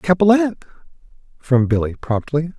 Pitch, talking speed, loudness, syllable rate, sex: 155 Hz, 95 wpm, -18 LUFS, 5.5 syllables/s, male